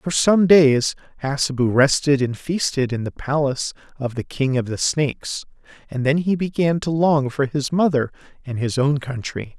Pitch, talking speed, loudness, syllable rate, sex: 140 Hz, 180 wpm, -20 LUFS, 4.7 syllables/s, male